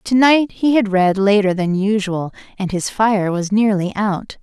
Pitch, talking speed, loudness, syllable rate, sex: 205 Hz, 190 wpm, -17 LUFS, 4.3 syllables/s, female